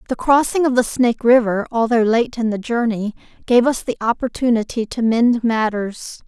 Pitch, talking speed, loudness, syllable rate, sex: 235 Hz, 170 wpm, -18 LUFS, 5.0 syllables/s, female